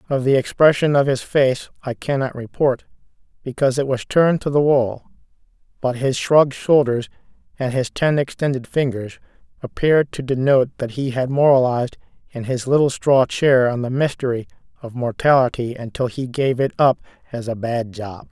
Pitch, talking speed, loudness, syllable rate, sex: 130 Hz, 165 wpm, -19 LUFS, 5.3 syllables/s, male